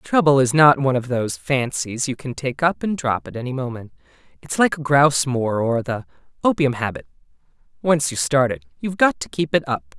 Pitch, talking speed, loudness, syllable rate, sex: 135 Hz, 205 wpm, -20 LUFS, 5.5 syllables/s, male